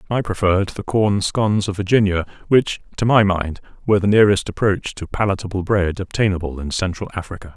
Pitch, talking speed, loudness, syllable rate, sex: 100 Hz, 175 wpm, -19 LUFS, 6.0 syllables/s, male